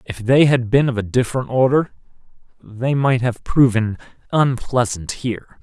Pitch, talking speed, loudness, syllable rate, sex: 120 Hz, 150 wpm, -18 LUFS, 4.7 syllables/s, male